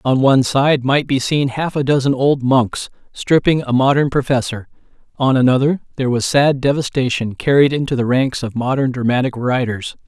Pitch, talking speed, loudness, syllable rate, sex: 130 Hz, 175 wpm, -16 LUFS, 5.2 syllables/s, male